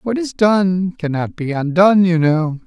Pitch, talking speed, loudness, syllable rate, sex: 175 Hz, 180 wpm, -16 LUFS, 4.3 syllables/s, male